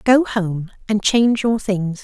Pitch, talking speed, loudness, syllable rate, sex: 210 Hz, 175 wpm, -18 LUFS, 3.9 syllables/s, female